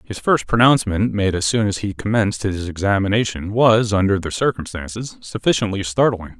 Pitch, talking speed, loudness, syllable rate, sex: 100 Hz, 160 wpm, -19 LUFS, 5.4 syllables/s, male